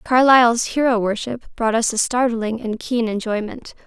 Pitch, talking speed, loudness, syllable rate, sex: 230 Hz, 155 wpm, -19 LUFS, 4.7 syllables/s, female